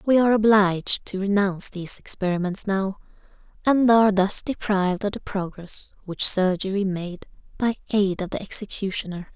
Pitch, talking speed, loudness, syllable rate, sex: 195 Hz, 150 wpm, -22 LUFS, 5.2 syllables/s, female